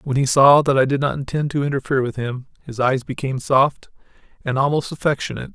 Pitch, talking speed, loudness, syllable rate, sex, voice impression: 135 Hz, 205 wpm, -19 LUFS, 6.3 syllables/s, male, very masculine, middle-aged, very thick, slightly relaxed, weak, slightly dark, slightly soft, slightly muffled, fluent, slightly raspy, cool, intellectual, slightly refreshing, sincere, calm, mature, very friendly, very reassuring, very unique, slightly elegant, wild, slightly sweet, lively, kind, slightly intense